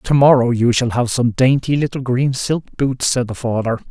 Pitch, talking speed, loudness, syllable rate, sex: 125 Hz, 215 wpm, -16 LUFS, 5.0 syllables/s, male